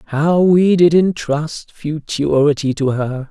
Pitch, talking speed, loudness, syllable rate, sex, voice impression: 155 Hz, 125 wpm, -15 LUFS, 3.4 syllables/s, male, masculine, adult-like, slightly clear, cool, slightly intellectual, slightly refreshing